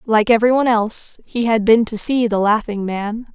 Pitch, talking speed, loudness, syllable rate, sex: 225 Hz, 215 wpm, -17 LUFS, 5.4 syllables/s, female